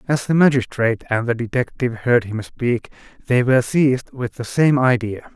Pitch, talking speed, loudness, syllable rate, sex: 125 Hz, 180 wpm, -19 LUFS, 5.3 syllables/s, male